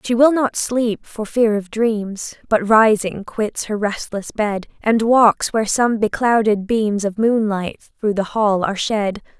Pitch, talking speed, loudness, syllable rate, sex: 215 Hz, 170 wpm, -18 LUFS, 3.9 syllables/s, female